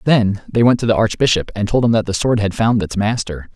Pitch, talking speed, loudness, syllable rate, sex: 105 Hz, 270 wpm, -16 LUFS, 5.8 syllables/s, male